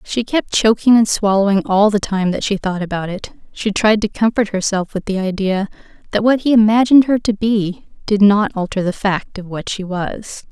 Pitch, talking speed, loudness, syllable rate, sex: 205 Hz, 210 wpm, -16 LUFS, 5.1 syllables/s, female